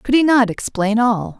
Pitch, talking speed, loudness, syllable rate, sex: 230 Hz, 215 wpm, -16 LUFS, 4.4 syllables/s, female